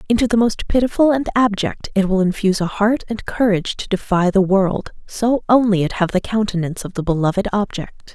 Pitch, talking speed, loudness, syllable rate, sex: 205 Hz, 200 wpm, -18 LUFS, 5.6 syllables/s, female